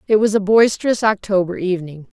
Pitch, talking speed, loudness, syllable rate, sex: 200 Hz, 165 wpm, -17 LUFS, 6.2 syllables/s, female